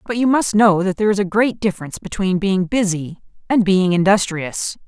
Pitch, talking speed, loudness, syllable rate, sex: 195 Hz, 195 wpm, -17 LUFS, 5.4 syllables/s, female